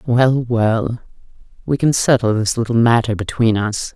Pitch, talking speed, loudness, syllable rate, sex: 115 Hz, 150 wpm, -16 LUFS, 4.4 syllables/s, female